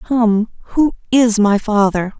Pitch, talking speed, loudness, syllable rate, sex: 220 Hz, 135 wpm, -15 LUFS, 3.5 syllables/s, female